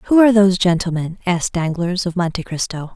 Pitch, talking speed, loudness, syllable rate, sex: 180 Hz, 185 wpm, -17 LUFS, 6.0 syllables/s, female